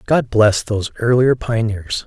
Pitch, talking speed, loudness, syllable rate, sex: 115 Hz, 145 wpm, -17 LUFS, 4.3 syllables/s, male